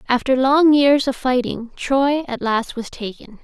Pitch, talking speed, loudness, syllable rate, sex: 255 Hz, 175 wpm, -18 LUFS, 4.1 syllables/s, female